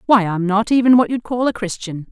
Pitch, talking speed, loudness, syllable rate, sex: 215 Hz, 255 wpm, -17 LUFS, 5.6 syllables/s, female